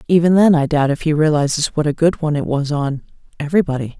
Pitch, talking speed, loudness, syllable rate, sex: 150 Hz, 210 wpm, -16 LUFS, 6.6 syllables/s, female